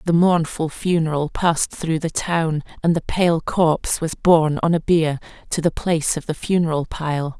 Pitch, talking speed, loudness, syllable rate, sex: 160 Hz, 185 wpm, -20 LUFS, 4.7 syllables/s, female